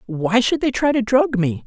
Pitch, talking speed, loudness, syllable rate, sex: 215 Hz, 250 wpm, -18 LUFS, 4.6 syllables/s, male